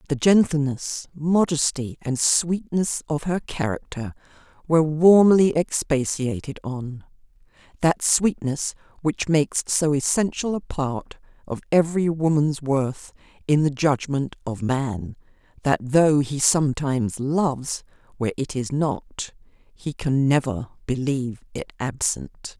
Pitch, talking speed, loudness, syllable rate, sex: 145 Hz, 115 wpm, -22 LUFS, 4.0 syllables/s, female